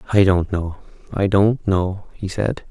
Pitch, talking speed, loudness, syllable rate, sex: 95 Hz, 155 wpm, -20 LUFS, 3.8 syllables/s, male